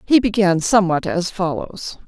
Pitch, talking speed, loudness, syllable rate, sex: 190 Hz, 145 wpm, -18 LUFS, 4.8 syllables/s, female